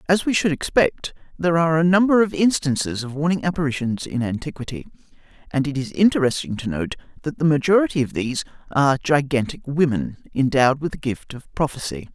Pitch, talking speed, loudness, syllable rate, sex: 150 Hz, 175 wpm, -21 LUFS, 6.1 syllables/s, male